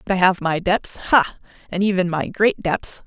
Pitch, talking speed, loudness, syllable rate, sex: 185 Hz, 215 wpm, -20 LUFS, 4.6 syllables/s, female